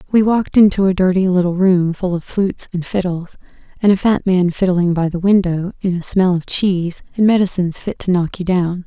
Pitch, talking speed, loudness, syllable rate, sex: 185 Hz, 215 wpm, -16 LUFS, 5.5 syllables/s, female